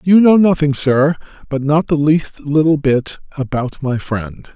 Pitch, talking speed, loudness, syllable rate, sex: 145 Hz, 145 wpm, -15 LUFS, 4.1 syllables/s, male